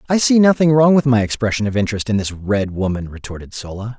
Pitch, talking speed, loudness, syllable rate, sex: 115 Hz, 225 wpm, -16 LUFS, 6.3 syllables/s, male